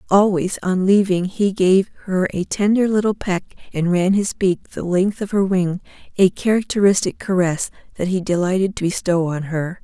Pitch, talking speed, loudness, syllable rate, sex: 190 Hz, 170 wpm, -19 LUFS, 4.9 syllables/s, female